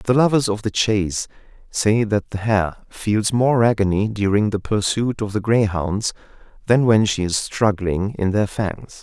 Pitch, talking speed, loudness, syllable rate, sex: 105 Hz, 175 wpm, -20 LUFS, 4.3 syllables/s, male